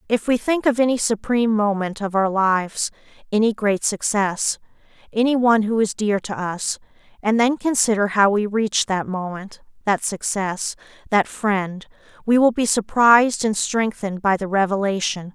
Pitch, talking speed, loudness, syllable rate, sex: 210 Hz, 160 wpm, -20 LUFS, 4.8 syllables/s, female